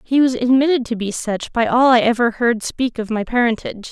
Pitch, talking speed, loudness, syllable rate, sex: 240 Hz, 230 wpm, -17 LUFS, 5.5 syllables/s, female